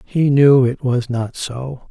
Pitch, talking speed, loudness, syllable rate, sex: 130 Hz, 190 wpm, -16 LUFS, 3.5 syllables/s, male